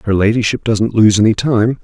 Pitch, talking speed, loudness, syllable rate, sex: 110 Hz, 195 wpm, -13 LUFS, 5.4 syllables/s, male